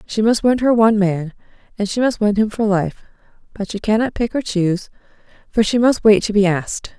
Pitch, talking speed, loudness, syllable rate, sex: 210 Hz, 225 wpm, -17 LUFS, 5.6 syllables/s, female